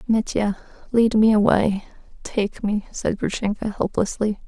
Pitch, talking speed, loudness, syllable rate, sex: 210 Hz, 120 wpm, -22 LUFS, 4.3 syllables/s, female